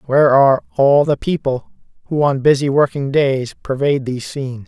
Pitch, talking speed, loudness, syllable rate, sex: 135 Hz, 165 wpm, -16 LUFS, 5.6 syllables/s, male